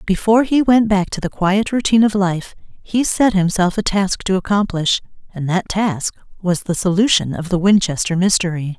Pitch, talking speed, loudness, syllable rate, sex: 190 Hz, 185 wpm, -17 LUFS, 5.1 syllables/s, female